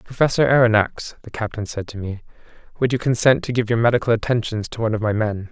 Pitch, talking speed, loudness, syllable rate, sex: 115 Hz, 220 wpm, -20 LUFS, 6.5 syllables/s, male